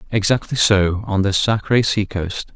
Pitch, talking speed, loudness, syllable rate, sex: 100 Hz, 165 wpm, -18 LUFS, 4.4 syllables/s, male